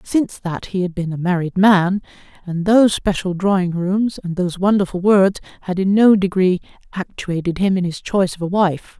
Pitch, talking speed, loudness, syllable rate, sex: 185 Hz, 195 wpm, -18 LUFS, 5.2 syllables/s, female